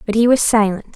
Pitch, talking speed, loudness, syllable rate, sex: 220 Hz, 250 wpm, -15 LUFS, 6.7 syllables/s, female